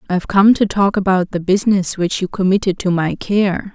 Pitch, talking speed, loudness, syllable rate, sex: 190 Hz, 210 wpm, -16 LUFS, 5.3 syllables/s, female